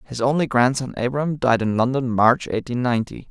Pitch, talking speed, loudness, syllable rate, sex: 125 Hz, 180 wpm, -20 LUFS, 5.7 syllables/s, male